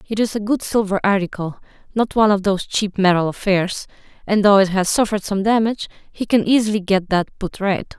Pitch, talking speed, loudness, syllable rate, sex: 200 Hz, 195 wpm, -18 LUFS, 5.8 syllables/s, female